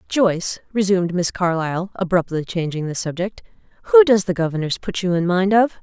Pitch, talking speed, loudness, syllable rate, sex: 185 Hz, 175 wpm, -19 LUFS, 5.7 syllables/s, female